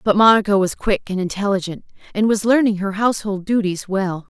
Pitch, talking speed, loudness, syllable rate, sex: 200 Hz, 180 wpm, -18 LUFS, 5.7 syllables/s, female